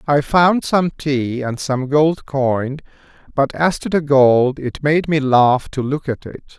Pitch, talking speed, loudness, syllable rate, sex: 140 Hz, 190 wpm, -17 LUFS, 3.7 syllables/s, male